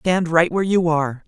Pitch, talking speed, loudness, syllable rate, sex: 170 Hz, 235 wpm, -18 LUFS, 5.7 syllables/s, male